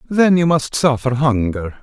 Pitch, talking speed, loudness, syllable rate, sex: 140 Hz, 165 wpm, -16 LUFS, 4.1 syllables/s, male